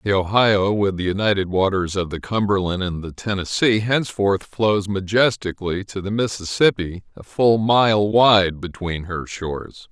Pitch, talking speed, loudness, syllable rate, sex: 100 Hz, 150 wpm, -20 LUFS, 4.5 syllables/s, male